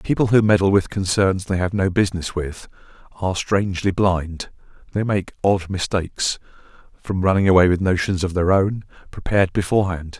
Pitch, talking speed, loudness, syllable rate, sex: 95 Hz, 155 wpm, -20 LUFS, 5.5 syllables/s, male